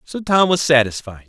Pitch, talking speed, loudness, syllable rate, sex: 145 Hz, 190 wpm, -16 LUFS, 5.1 syllables/s, male